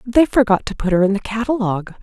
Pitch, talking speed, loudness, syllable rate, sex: 215 Hz, 240 wpm, -17 LUFS, 6.4 syllables/s, female